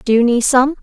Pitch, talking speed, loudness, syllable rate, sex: 255 Hz, 290 wpm, -13 LUFS, 5.9 syllables/s, female